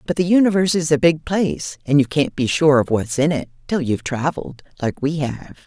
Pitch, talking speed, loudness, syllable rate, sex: 150 Hz, 235 wpm, -19 LUFS, 5.9 syllables/s, female